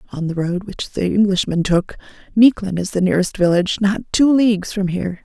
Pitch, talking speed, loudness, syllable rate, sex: 195 Hz, 195 wpm, -17 LUFS, 5.9 syllables/s, female